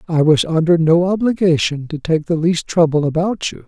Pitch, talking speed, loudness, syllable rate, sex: 165 Hz, 195 wpm, -16 LUFS, 5.2 syllables/s, male